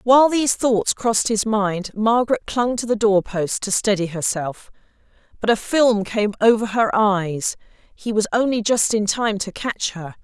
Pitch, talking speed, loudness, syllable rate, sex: 215 Hz, 170 wpm, -19 LUFS, 4.5 syllables/s, female